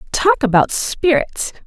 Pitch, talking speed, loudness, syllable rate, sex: 285 Hz, 110 wpm, -16 LUFS, 3.8 syllables/s, female